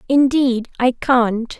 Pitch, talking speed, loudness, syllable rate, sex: 250 Hz, 115 wpm, -17 LUFS, 3.2 syllables/s, female